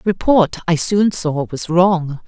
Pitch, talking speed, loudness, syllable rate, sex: 175 Hz, 160 wpm, -16 LUFS, 3.4 syllables/s, female